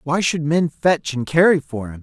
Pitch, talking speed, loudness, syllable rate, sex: 150 Hz, 235 wpm, -18 LUFS, 4.7 syllables/s, male